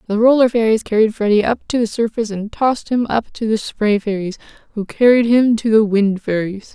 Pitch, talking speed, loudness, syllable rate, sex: 220 Hz, 215 wpm, -16 LUFS, 5.6 syllables/s, female